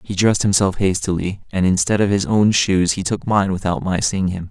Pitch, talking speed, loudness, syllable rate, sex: 95 Hz, 225 wpm, -18 LUFS, 5.3 syllables/s, male